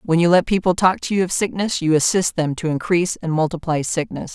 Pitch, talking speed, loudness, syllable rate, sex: 170 Hz, 235 wpm, -19 LUFS, 5.9 syllables/s, female